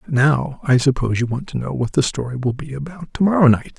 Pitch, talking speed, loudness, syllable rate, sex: 135 Hz, 270 wpm, -19 LUFS, 6.0 syllables/s, male